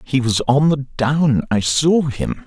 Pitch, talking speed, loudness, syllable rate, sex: 140 Hz, 170 wpm, -17 LUFS, 3.6 syllables/s, male